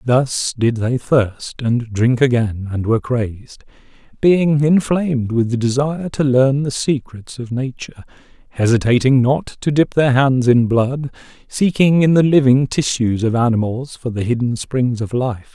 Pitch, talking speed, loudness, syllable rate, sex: 125 Hz, 160 wpm, -17 LUFS, 4.4 syllables/s, male